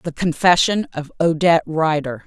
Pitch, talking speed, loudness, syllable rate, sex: 160 Hz, 130 wpm, -17 LUFS, 4.7 syllables/s, female